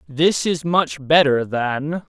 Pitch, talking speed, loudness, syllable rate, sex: 145 Hz, 140 wpm, -19 LUFS, 3.1 syllables/s, male